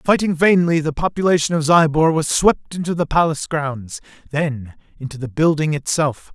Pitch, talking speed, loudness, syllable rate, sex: 155 Hz, 160 wpm, -18 LUFS, 5.1 syllables/s, male